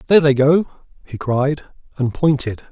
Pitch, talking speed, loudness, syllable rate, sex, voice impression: 140 Hz, 155 wpm, -17 LUFS, 5.3 syllables/s, male, masculine, adult-like, sincere, reassuring